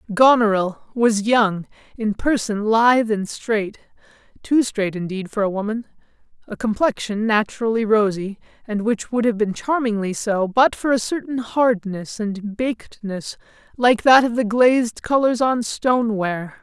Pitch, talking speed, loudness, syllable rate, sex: 220 Hz, 150 wpm, -20 LUFS, 4.5 syllables/s, male